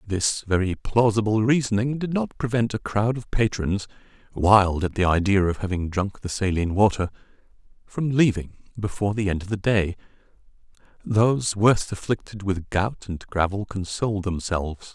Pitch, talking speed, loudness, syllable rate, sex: 105 Hz, 155 wpm, -23 LUFS, 5.0 syllables/s, male